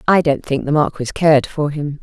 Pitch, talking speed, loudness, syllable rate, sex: 150 Hz, 235 wpm, -17 LUFS, 5.5 syllables/s, female